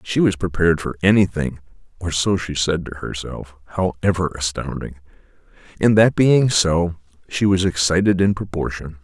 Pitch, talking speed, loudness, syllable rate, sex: 85 Hz, 145 wpm, -19 LUFS, 5.0 syllables/s, male